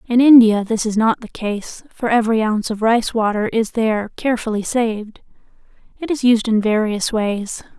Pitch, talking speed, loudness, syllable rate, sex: 225 Hz, 175 wpm, -17 LUFS, 5.1 syllables/s, female